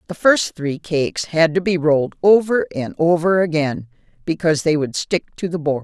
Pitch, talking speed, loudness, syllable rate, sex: 165 Hz, 195 wpm, -18 LUFS, 5.2 syllables/s, female